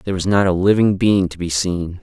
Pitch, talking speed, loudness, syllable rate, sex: 95 Hz, 265 wpm, -17 LUFS, 5.5 syllables/s, male